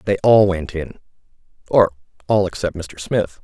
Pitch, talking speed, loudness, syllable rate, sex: 95 Hz, 140 wpm, -18 LUFS, 4.6 syllables/s, male